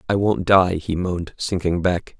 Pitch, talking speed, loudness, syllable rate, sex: 90 Hz, 190 wpm, -20 LUFS, 4.6 syllables/s, male